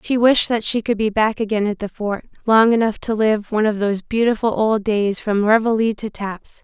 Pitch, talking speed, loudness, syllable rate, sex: 215 Hz, 225 wpm, -18 LUFS, 5.2 syllables/s, female